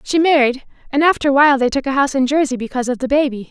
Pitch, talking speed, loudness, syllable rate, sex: 270 Hz, 275 wpm, -16 LUFS, 7.5 syllables/s, female